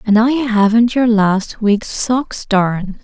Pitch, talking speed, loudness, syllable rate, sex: 220 Hz, 160 wpm, -15 LUFS, 3.4 syllables/s, female